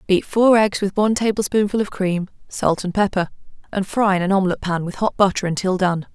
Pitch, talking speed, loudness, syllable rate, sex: 195 Hz, 215 wpm, -19 LUFS, 5.8 syllables/s, female